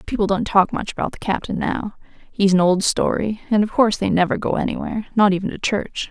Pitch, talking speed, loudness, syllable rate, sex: 205 Hz, 215 wpm, -20 LUFS, 6.1 syllables/s, female